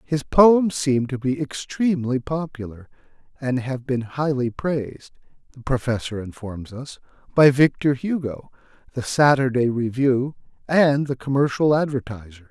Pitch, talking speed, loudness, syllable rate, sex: 135 Hz, 125 wpm, -21 LUFS, 4.6 syllables/s, male